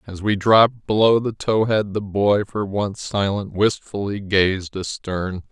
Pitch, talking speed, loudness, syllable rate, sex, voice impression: 100 Hz, 150 wpm, -20 LUFS, 4.0 syllables/s, male, masculine, middle-aged, thick, tensed, slightly powerful, clear, slightly halting, slightly cool, slightly mature, friendly, wild, lively, intense, sharp